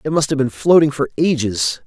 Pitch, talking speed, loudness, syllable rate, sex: 145 Hz, 225 wpm, -16 LUFS, 5.4 syllables/s, male